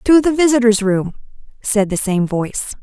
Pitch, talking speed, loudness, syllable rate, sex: 225 Hz, 170 wpm, -16 LUFS, 4.9 syllables/s, female